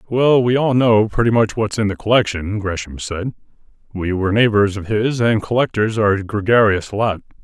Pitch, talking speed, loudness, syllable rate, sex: 105 Hz, 185 wpm, -17 LUFS, 5.3 syllables/s, male